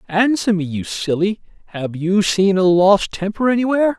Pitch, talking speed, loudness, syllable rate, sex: 195 Hz, 165 wpm, -17 LUFS, 4.9 syllables/s, male